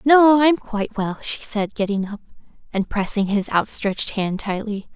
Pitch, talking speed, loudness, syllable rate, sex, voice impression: 215 Hz, 170 wpm, -21 LUFS, 4.7 syllables/s, female, feminine, young, thin, weak, slightly bright, soft, slightly cute, calm, slightly reassuring, slightly elegant, slightly sweet, kind, modest